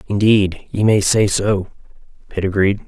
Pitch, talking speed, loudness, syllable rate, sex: 100 Hz, 145 wpm, -16 LUFS, 4.3 syllables/s, male